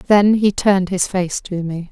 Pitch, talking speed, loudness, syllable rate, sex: 190 Hz, 220 wpm, -17 LUFS, 4.3 syllables/s, female